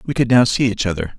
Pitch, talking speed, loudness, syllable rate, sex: 110 Hz, 305 wpm, -16 LUFS, 6.7 syllables/s, male